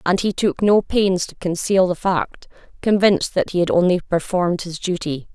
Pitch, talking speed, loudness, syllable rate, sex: 185 Hz, 190 wpm, -19 LUFS, 5.0 syllables/s, female